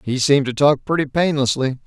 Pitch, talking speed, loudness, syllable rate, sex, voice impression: 135 Hz, 195 wpm, -18 LUFS, 5.8 syllables/s, male, very masculine, very adult-like, slightly old, very thick, slightly tensed, slightly powerful, bright, slightly hard, slightly muffled, fluent, slightly raspy, cool, very intellectual, sincere, very calm, very mature, friendly, very reassuring, very unique, slightly elegant, wild, slightly sweet, lively, kind, slightly intense, slightly modest